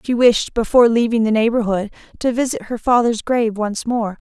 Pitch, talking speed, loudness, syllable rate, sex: 230 Hz, 185 wpm, -17 LUFS, 5.5 syllables/s, female